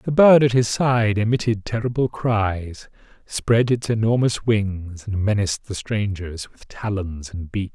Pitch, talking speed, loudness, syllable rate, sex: 110 Hz, 155 wpm, -21 LUFS, 4.1 syllables/s, male